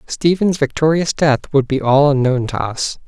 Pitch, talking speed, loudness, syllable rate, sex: 140 Hz, 175 wpm, -16 LUFS, 4.6 syllables/s, male